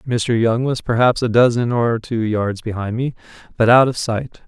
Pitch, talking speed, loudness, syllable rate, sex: 115 Hz, 200 wpm, -17 LUFS, 4.5 syllables/s, male